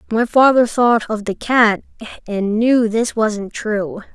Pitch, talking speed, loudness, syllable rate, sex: 220 Hz, 160 wpm, -16 LUFS, 3.5 syllables/s, female